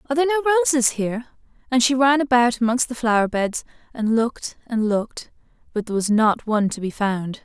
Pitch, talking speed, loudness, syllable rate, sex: 240 Hz, 195 wpm, -20 LUFS, 6.3 syllables/s, female